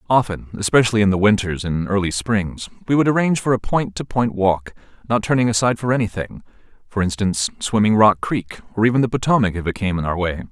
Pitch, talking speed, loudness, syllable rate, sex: 105 Hz, 205 wpm, -19 LUFS, 6.2 syllables/s, male